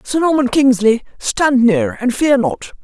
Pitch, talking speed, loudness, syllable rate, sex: 260 Hz, 170 wpm, -14 LUFS, 4.0 syllables/s, female